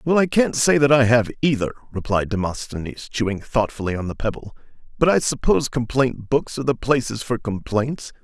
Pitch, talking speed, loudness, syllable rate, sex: 120 Hz, 180 wpm, -21 LUFS, 5.5 syllables/s, male